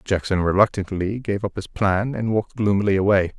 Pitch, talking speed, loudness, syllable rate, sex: 100 Hz, 175 wpm, -21 LUFS, 5.5 syllables/s, male